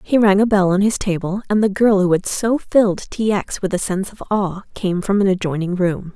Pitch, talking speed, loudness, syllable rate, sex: 195 Hz, 255 wpm, -18 LUFS, 5.3 syllables/s, female